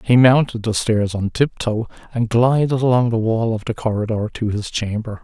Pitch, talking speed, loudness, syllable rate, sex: 115 Hz, 205 wpm, -19 LUFS, 5.0 syllables/s, male